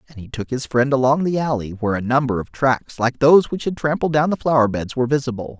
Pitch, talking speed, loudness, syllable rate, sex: 130 Hz, 245 wpm, -19 LUFS, 6.3 syllables/s, male